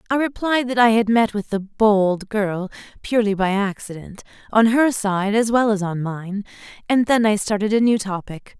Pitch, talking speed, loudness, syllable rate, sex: 210 Hz, 195 wpm, -19 LUFS, 4.8 syllables/s, female